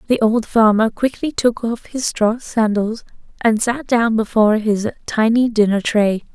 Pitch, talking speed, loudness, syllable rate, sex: 225 Hz, 160 wpm, -17 LUFS, 4.3 syllables/s, female